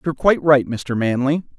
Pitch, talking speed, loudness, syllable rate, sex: 140 Hz, 190 wpm, -18 LUFS, 6.0 syllables/s, male